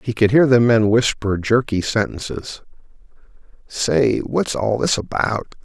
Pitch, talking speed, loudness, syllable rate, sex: 115 Hz, 115 wpm, -18 LUFS, 4.2 syllables/s, male